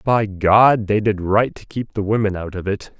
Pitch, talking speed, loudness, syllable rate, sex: 105 Hz, 240 wpm, -18 LUFS, 4.5 syllables/s, male